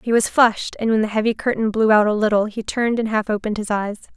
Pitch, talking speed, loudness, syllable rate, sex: 215 Hz, 275 wpm, -19 LUFS, 6.6 syllables/s, female